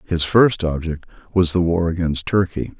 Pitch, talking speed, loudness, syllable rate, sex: 85 Hz, 170 wpm, -19 LUFS, 4.8 syllables/s, male